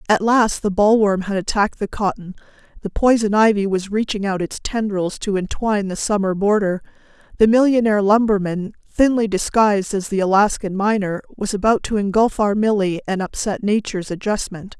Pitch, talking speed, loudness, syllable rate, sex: 205 Hz, 155 wpm, -18 LUFS, 5.4 syllables/s, female